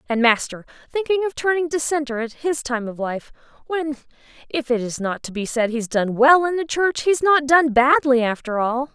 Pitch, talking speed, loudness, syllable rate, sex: 270 Hz, 210 wpm, -20 LUFS, 4.9 syllables/s, female